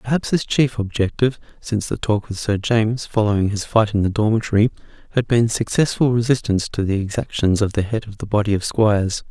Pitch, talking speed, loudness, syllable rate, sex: 110 Hz, 200 wpm, -19 LUFS, 6.0 syllables/s, male